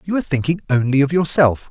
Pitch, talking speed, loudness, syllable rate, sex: 150 Hz, 210 wpm, -17 LUFS, 6.5 syllables/s, male